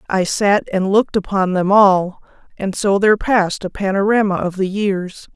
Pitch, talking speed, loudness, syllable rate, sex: 195 Hz, 180 wpm, -16 LUFS, 4.9 syllables/s, female